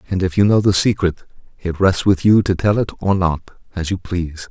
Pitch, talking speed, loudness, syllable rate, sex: 90 Hz, 240 wpm, -17 LUFS, 5.3 syllables/s, male